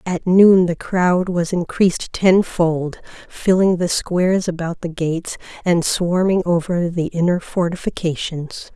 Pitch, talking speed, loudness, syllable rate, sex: 175 Hz, 135 wpm, -18 LUFS, 4.1 syllables/s, female